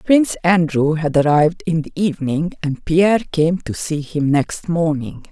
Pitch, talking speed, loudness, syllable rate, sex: 165 Hz, 170 wpm, -18 LUFS, 4.5 syllables/s, female